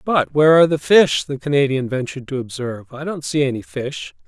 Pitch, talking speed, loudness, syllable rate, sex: 140 Hz, 210 wpm, -18 LUFS, 5.9 syllables/s, male